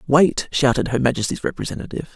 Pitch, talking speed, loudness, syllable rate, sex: 135 Hz, 140 wpm, -20 LUFS, 6.6 syllables/s, male